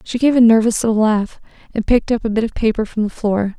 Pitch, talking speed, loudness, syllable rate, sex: 220 Hz, 265 wpm, -16 LUFS, 6.3 syllables/s, female